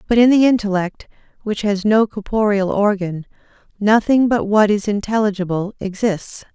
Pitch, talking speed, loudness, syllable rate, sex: 205 Hz, 135 wpm, -17 LUFS, 4.8 syllables/s, female